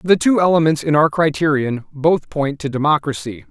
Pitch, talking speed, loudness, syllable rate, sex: 150 Hz, 170 wpm, -17 LUFS, 5.2 syllables/s, male